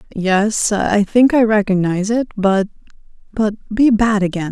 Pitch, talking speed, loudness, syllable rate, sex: 210 Hz, 120 wpm, -16 LUFS, 4.4 syllables/s, female